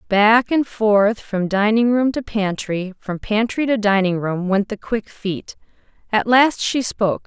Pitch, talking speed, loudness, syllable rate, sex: 210 Hz, 175 wpm, -19 LUFS, 4.0 syllables/s, female